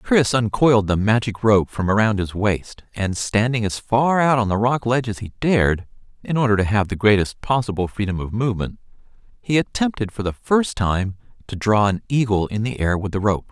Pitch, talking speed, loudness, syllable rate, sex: 110 Hz, 210 wpm, -20 LUFS, 5.3 syllables/s, male